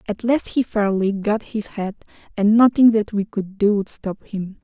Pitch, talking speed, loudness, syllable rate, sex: 210 Hz, 205 wpm, -20 LUFS, 4.4 syllables/s, female